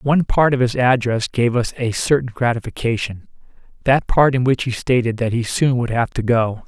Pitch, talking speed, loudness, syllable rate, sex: 120 Hz, 200 wpm, -18 LUFS, 5.2 syllables/s, male